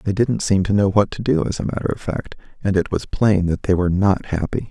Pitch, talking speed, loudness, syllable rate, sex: 100 Hz, 280 wpm, -20 LUFS, 5.8 syllables/s, male